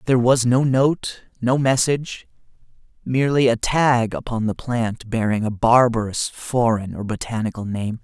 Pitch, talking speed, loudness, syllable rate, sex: 120 Hz, 140 wpm, -20 LUFS, 4.6 syllables/s, male